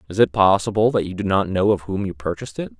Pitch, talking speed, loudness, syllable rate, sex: 95 Hz, 280 wpm, -20 LUFS, 6.7 syllables/s, male